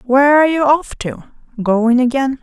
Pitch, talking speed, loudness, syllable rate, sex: 265 Hz, 175 wpm, -13 LUFS, 5.2 syllables/s, female